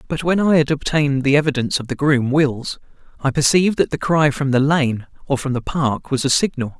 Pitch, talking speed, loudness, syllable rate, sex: 145 Hz, 230 wpm, -18 LUFS, 5.7 syllables/s, male